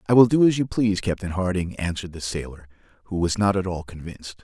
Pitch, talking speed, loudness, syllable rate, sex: 95 Hz, 230 wpm, -23 LUFS, 6.7 syllables/s, male